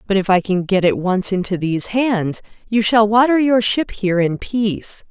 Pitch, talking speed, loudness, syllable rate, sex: 205 Hz, 210 wpm, -17 LUFS, 5.0 syllables/s, female